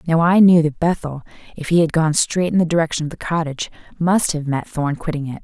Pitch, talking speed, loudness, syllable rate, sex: 165 Hz, 245 wpm, -18 LUFS, 6.0 syllables/s, female